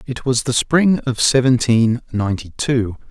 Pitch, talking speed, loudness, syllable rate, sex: 125 Hz, 155 wpm, -17 LUFS, 4.3 syllables/s, male